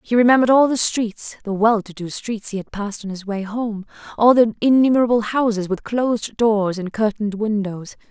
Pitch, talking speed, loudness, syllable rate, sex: 220 Hz, 190 wpm, -19 LUFS, 5.4 syllables/s, female